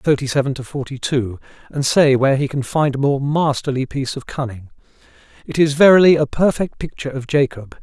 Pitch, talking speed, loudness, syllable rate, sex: 140 Hz, 190 wpm, -17 LUFS, 5.8 syllables/s, male